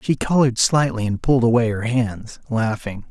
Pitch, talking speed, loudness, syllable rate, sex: 120 Hz, 175 wpm, -19 LUFS, 5.2 syllables/s, male